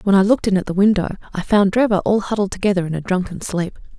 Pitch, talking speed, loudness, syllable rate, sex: 195 Hz, 255 wpm, -18 LUFS, 7.0 syllables/s, female